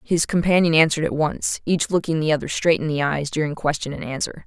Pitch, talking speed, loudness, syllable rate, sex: 155 Hz, 230 wpm, -21 LUFS, 6.0 syllables/s, female